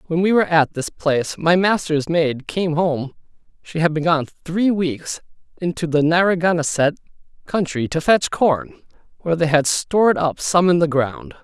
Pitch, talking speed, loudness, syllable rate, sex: 165 Hz, 175 wpm, -19 LUFS, 4.7 syllables/s, male